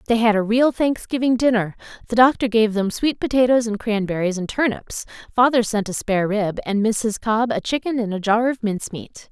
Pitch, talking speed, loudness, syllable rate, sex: 225 Hz, 205 wpm, -20 LUFS, 5.3 syllables/s, female